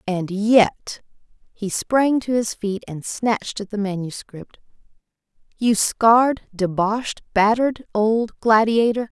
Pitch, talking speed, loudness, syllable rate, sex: 215 Hz, 105 wpm, -20 LUFS, 3.6 syllables/s, female